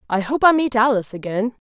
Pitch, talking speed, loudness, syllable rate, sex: 235 Hz, 215 wpm, -18 LUFS, 6.4 syllables/s, female